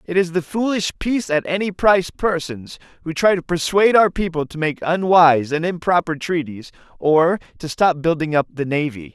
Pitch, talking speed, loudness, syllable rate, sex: 170 Hz, 185 wpm, -18 LUFS, 5.2 syllables/s, male